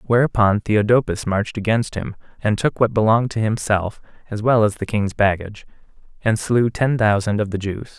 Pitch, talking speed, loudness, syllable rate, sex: 110 Hz, 180 wpm, -19 LUFS, 5.3 syllables/s, male